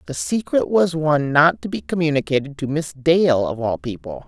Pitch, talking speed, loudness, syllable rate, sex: 150 Hz, 195 wpm, -19 LUFS, 5.1 syllables/s, female